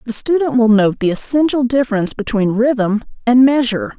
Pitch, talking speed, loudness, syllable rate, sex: 235 Hz, 165 wpm, -15 LUFS, 5.5 syllables/s, female